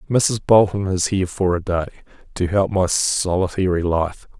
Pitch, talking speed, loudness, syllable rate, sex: 95 Hz, 165 wpm, -19 LUFS, 4.8 syllables/s, male